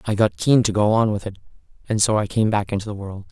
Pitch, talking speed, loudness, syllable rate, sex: 105 Hz, 290 wpm, -20 LUFS, 6.4 syllables/s, male